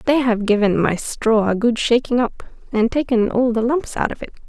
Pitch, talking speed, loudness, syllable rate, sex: 235 Hz, 230 wpm, -18 LUFS, 5.0 syllables/s, female